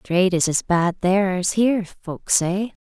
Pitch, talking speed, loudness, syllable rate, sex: 190 Hz, 190 wpm, -20 LUFS, 4.4 syllables/s, female